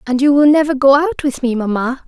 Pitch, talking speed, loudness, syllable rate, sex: 275 Hz, 260 wpm, -14 LUFS, 5.8 syllables/s, female